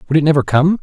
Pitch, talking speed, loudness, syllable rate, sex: 155 Hz, 290 wpm, -14 LUFS, 8.1 syllables/s, male